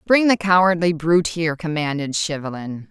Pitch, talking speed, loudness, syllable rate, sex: 165 Hz, 145 wpm, -19 LUFS, 5.4 syllables/s, female